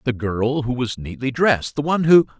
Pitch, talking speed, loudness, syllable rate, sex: 130 Hz, 225 wpm, -20 LUFS, 5.5 syllables/s, male